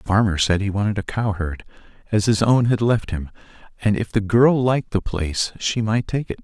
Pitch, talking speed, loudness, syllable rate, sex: 105 Hz, 225 wpm, -20 LUFS, 5.4 syllables/s, male